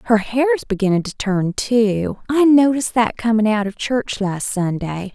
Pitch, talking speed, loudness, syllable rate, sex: 220 Hz, 175 wpm, -18 LUFS, 4.3 syllables/s, female